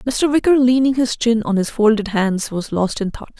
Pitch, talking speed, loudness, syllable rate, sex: 230 Hz, 230 wpm, -17 LUFS, 5.0 syllables/s, female